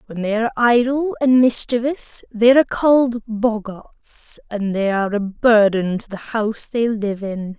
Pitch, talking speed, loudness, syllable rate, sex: 225 Hz, 165 wpm, -18 LUFS, 4.4 syllables/s, female